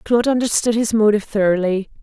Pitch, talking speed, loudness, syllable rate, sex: 215 Hz, 150 wpm, -17 LUFS, 6.6 syllables/s, female